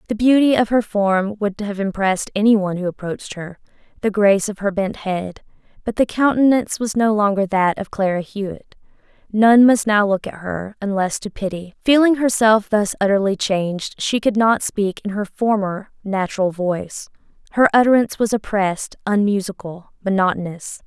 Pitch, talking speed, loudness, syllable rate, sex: 205 Hz, 165 wpm, -18 LUFS, 5.2 syllables/s, female